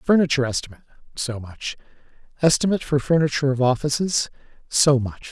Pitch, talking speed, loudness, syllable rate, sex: 140 Hz, 125 wpm, -21 LUFS, 6.4 syllables/s, male